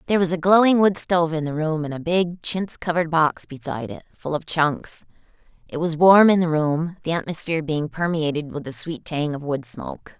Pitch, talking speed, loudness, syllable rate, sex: 160 Hz, 220 wpm, -21 LUFS, 5.4 syllables/s, female